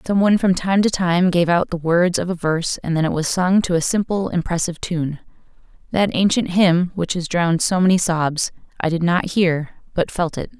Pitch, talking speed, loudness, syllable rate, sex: 175 Hz, 220 wpm, -19 LUFS, 5.3 syllables/s, female